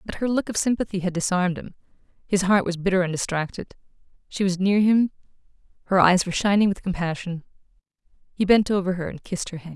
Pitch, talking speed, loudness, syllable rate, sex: 185 Hz, 190 wpm, -23 LUFS, 6.5 syllables/s, female